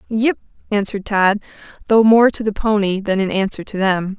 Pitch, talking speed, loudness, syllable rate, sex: 205 Hz, 185 wpm, -17 LUFS, 5.2 syllables/s, female